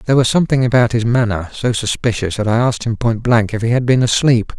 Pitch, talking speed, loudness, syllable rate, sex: 115 Hz, 250 wpm, -15 LUFS, 6.4 syllables/s, male